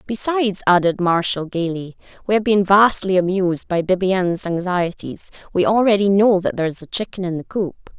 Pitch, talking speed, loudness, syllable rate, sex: 190 Hz, 175 wpm, -18 LUFS, 5.5 syllables/s, female